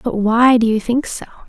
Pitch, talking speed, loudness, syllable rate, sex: 230 Hz, 245 wpm, -15 LUFS, 5.0 syllables/s, female